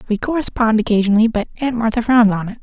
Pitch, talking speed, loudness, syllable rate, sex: 225 Hz, 205 wpm, -16 LUFS, 6.8 syllables/s, female